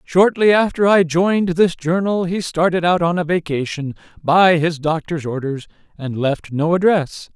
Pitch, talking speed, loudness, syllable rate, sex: 170 Hz, 165 wpm, -17 LUFS, 4.5 syllables/s, male